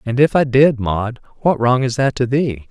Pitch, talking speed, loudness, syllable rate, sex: 125 Hz, 245 wpm, -16 LUFS, 4.6 syllables/s, male